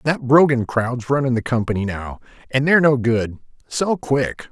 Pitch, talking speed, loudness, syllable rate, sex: 130 Hz, 175 wpm, -19 LUFS, 4.7 syllables/s, male